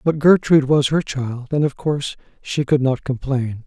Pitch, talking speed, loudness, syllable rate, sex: 140 Hz, 195 wpm, -19 LUFS, 4.9 syllables/s, male